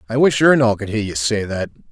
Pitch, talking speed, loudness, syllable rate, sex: 115 Hz, 250 wpm, -17 LUFS, 5.8 syllables/s, male